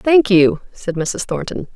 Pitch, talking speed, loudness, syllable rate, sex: 200 Hz, 170 wpm, -17 LUFS, 3.8 syllables/s, female